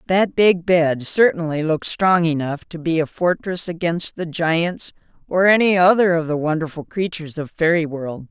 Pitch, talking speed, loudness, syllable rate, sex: 165 Hz, 175 wpm, -19 LUFS, 4.8 syllables/s, female